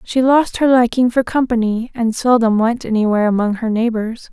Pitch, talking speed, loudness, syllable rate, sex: 235 Hz, 180 wpm, -16 LUFS, 5.3 syllables/s, female